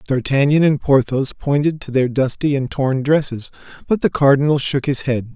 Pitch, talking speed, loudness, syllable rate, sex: 140 Hz, 180 wpm, -17 LUFS, 5.0 syllables/s, male